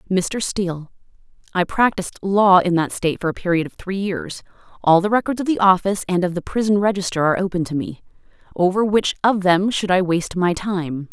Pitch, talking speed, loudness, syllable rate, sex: 185 Hz, 205 wpm, -19 LUFS, 5.8 syllables/s, female